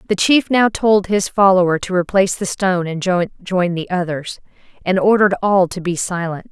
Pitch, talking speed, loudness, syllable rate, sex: 185 Hz, 185 wpm, -16 LUFS, 5.1 syllables/s, female